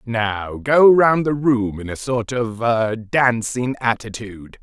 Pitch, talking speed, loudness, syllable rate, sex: 120 Hz, 155 wpm, -18 LUFS, 3.6 syllables/s, male